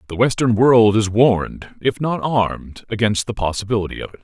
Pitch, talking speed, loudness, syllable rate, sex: 110 Hz, 185 wpm, -18 LUFS, 5.5 syllables/s, male